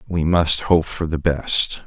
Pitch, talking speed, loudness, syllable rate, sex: 80 Hz, 195 wpm, -19 LUFS, 3.5 syllables/s, male